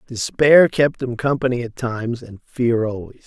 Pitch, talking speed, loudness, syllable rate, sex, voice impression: 125 Hz, 165 wpm, -18 LUFS, 4.6 syllables/s, male, masculine, middle-aged, relaxed, slightly weak, muffled, slightly halting, calm, slightly mature, slightly friendly, slightly wild, kind, modest